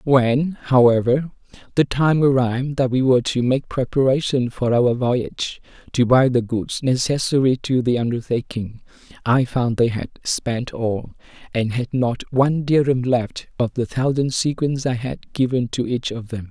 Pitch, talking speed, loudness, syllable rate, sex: 125 Hz, 165 wpm, -20 LUFS, 4.5 syllables/s, male